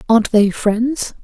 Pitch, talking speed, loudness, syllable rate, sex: 225 Hz, 145 wpm, -16 LUFS, 4.0 syllables/s, female